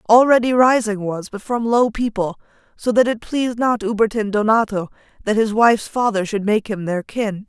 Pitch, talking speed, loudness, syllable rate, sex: 220 Hz, 185 wpm, -18 LUFS, 5.1 syllables/s, female